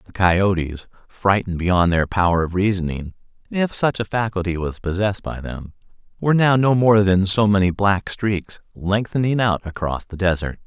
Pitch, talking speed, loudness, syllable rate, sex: 95 Hz, 170 wpm, -20 LUFS, 5.0 syllables/s, male